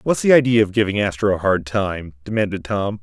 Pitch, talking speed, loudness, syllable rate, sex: 100 Hz, 220 wpm, -18 LUFS, 5.6 syllables/s, male